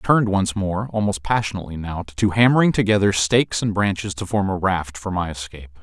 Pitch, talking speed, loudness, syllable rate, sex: 100 Hz, 205 wpm, -20 LUFS, 6.2 syllables/s, male